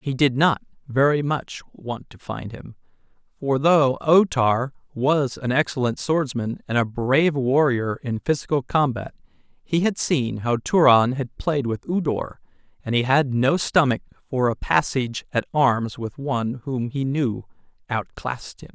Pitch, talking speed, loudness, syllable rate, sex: 135 Hz, 165 wpm, -22 LUFS, 4.2 syllables/s, male